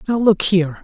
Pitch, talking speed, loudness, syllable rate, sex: 195 Hz, 215 wpm, -16 LUFS, 6.2 syllables/s, male